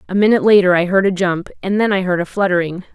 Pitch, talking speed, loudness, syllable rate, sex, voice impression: 190 Hz, 265 wpm, -15 LUFS, 7.0 syllables/s, female, very feminine, slightly young, slightly thin, tensed, slightly powerful, slightly dark, slightly hard, clear, fluent, cute, intellectual, very refreshing, sincere, calm, very friendly, reassuring, unique, elegant, slightly wild, sweet, lively, kind, slightly intense, slightly light